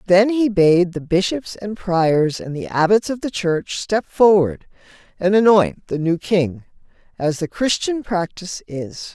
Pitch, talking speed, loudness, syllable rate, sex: 190 Hz, 165 wpm, -18 LUFS, 4.1 syllables/s, female